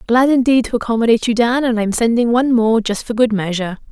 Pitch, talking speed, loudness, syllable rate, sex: 230 Hz, 230 wpm, -15 LUFS, 6.5 syllables/s, female